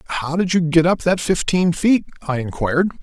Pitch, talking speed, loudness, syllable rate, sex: 165 Hz, 200 wpm, -18 LUFS, 5.7 syllables/s, male